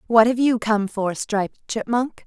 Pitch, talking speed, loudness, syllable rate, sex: 225 Hz, 185 wpm, -21 LUFS, 4.3 syllables/s, female